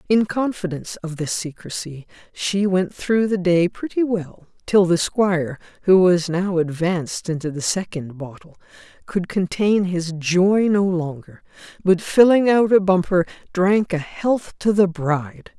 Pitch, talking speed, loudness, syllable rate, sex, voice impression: 180 Hz, 155 wpm, -20 LUFS, 4.3 syllables/s, female, very feminine, middle-aged, thin, slightly relaxed, powerful, slightly dark, soft, muffled, fluent, slightly raspy, cool, intellectual, slightly sincere, calm, slightly friendly, reassuring, unique, very elegant, slightly wild, sweet, slightly lively, strict, slightly sharp